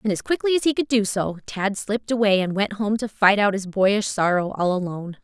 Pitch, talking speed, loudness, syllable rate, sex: 205 Hz, 250 wpm, -21 LUFS, 5.6 syllables/s, female